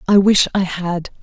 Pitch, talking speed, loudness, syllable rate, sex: 185 Hz, 195 wpm, -16 LUFS, 4.3 syllables/s, female